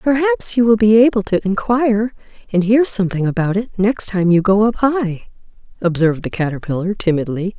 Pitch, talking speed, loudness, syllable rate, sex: 205 Hz, 175 wpm, -16 LUFS, 5.5 syllables/s, female